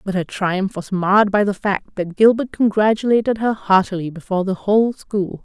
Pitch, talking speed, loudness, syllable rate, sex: 200 Hz, 190 wpm, -18 LUFS, 5.4 syllables/s, female